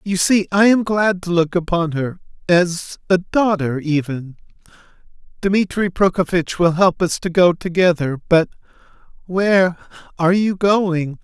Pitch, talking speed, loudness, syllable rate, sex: 180 Hz, 140 wpm, -17 LUFS, 4.3 syllables/s, male